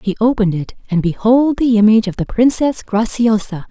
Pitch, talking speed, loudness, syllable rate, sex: 220 Hz, 180 wpm, -15 LUFS, 5.6 syllables/s, female